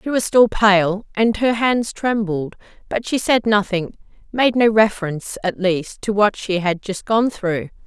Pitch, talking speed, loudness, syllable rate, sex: 205 Hz, 185 wpm, -18 LUFS, 4.2 syllables/s, female